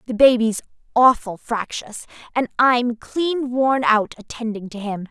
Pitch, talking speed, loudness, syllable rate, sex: 235 Hz, 140 wpm, -20 LUFS, 4.1 syllables/s, female